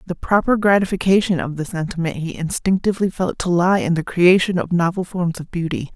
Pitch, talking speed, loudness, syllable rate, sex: 180 Hz, 190 wpm, -19 LUFS, 5.7 syllables/s, female